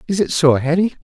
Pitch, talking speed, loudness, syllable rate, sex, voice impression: 165 Hz, 230 wpm, -16 LUFS, 6.3 syllables/s, male, masculine, middle-aged, slightly powerful, slightly dark, hard, clear, slightly raspy, cool, calm, mature, wild, slightly strict, modest